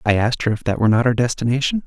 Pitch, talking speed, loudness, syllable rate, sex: 120 Hz, 290 wpm, -18 LUFS, 7.9 syllables/s, male